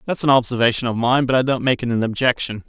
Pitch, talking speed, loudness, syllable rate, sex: 125 Hz, 270 wpm, -18 LUFS, 6.8 syllables/s, male